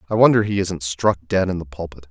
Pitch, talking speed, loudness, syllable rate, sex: 90 Hz, 255 wpm, -19 LUFS, 5.9 syllables/s, male